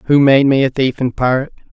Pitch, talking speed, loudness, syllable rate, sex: 130 Hz, 205 wpm, -14 LUFS, 5.3 syllables/s, male